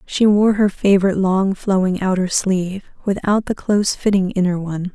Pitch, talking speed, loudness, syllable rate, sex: 190 Hz, 170 wpm, -17 LUFS, 5.3 syllables/s, female